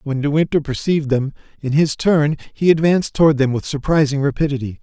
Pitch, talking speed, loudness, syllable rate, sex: 145 Hz, 185 wpm, -17 LUFS, 6.1 syllables/s, male